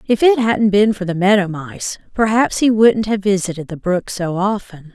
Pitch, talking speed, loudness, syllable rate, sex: 200 Hz, 205 wpm, -16 LUFS, 4.7 syllables/s, female